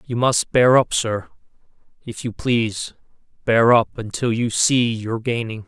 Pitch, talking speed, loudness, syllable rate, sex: 115 Hz, 150 wpm, -19 LUFS, 4.4 syllables/s, male